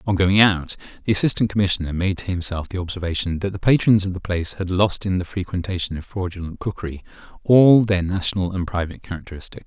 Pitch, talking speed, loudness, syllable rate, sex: 95 Hz, 190 wpm, -21 LUFS, 6.5 syllables/s, male